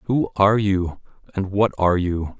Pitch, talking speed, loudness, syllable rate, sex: 95 Hz, 175 wpm, -20 LUFS, 5.1 syllables/s, male